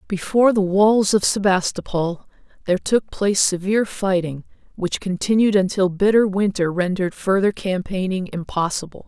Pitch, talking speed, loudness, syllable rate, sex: 190 Hz, 125 wpm, -19 LUFS, 5.1 syllables/s, female